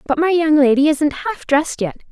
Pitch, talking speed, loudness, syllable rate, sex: 300 Hz, 225 wpm, -16 LUFS, 5.2 syllables/s, female